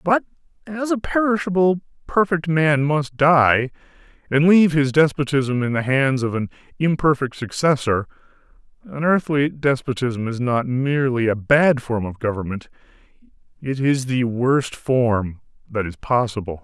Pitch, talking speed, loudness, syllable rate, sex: 140 Hz, 135 wpm, -20 LUFS, 4.5 syllables/s, male